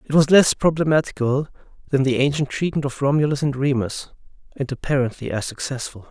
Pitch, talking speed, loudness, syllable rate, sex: 140 Hz, 155 wpm, -21 LUFS, 5.9 syllables/s, male